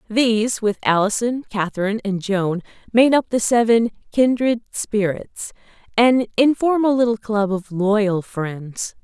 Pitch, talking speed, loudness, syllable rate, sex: 220 Hz, 125 wpm, -19 LUFS, 4.2 syllables/s, female